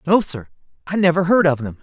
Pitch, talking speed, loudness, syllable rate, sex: 165 Hz, 230 wpm, -18 LUFS, 6.0 syllables/s, male